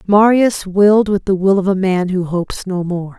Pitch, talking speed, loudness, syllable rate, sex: 190 Hz, 225 wpm, -15 LUFS, 4.9 syllables/s, female